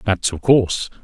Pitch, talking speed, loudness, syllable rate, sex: 100 Hz, 175 wpm, -17 LUFS, 5.1 syllables/s, male